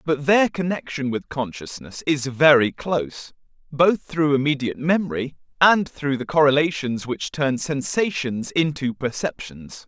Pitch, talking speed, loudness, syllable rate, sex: 140 Hz, 130 wpm, -21 LUFS, 4.4 syllables/s, male